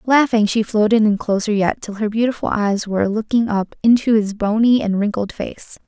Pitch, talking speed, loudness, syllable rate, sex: 215 Hz, 195 wpm, -18 LUFS, 5.2 syllables/s, female